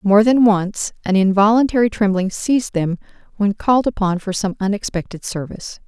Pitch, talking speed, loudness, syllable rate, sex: 205 Hz, 155 wpm, -17 LUFS, 5.4 syllables/s, female